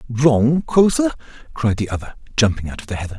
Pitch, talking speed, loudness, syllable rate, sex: 110 Hz, 190 wpm, -19 LUFS, 5.8 syllables/s, male